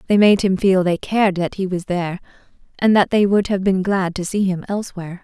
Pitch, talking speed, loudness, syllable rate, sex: 190 Hz, 240 wpm, -18 LUFS, 5.8 syllables/s, female